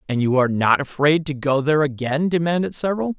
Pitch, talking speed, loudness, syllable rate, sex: 150 Hz, 205 wpm, -20 LUFS, 6.3 syllables/s, male